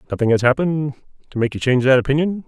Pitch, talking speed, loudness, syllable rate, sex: 135 Hz, 220 wpm, -18 LUFS, 7.9 syllables/s, male